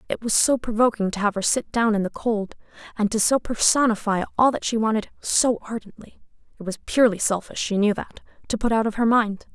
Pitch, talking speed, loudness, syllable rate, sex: 220 Hz, 210 wpm, -22 LUFS, 5.8 syllables/s, female